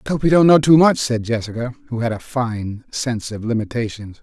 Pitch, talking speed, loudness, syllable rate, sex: 120 Hz, 225 wpm, -18 LUFS, 5.8 syllables/s, male